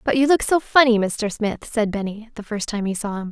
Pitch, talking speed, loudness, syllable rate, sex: 225 Hz, 270 wpm, -20 LUFS, 5.4 syllables/s, female